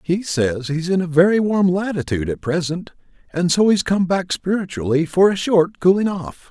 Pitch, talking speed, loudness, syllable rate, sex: 175 Hz, 195 wpm, -18 LUFS, 5.0 syllables/s, male